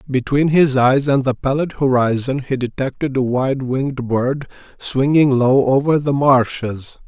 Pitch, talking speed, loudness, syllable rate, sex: 135 Hz, 155 wpm, -17 LUFS, 4.3 syllables/s, male